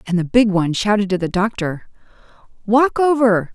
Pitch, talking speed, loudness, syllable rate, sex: 205 Hz, 170 wpm, -17 LUFS, 5.2 syllables/s, female